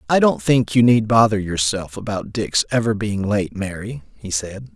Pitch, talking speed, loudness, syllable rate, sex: 105 Hz, 190 wpm, -19 LUFS, 4.6 syllables/s, male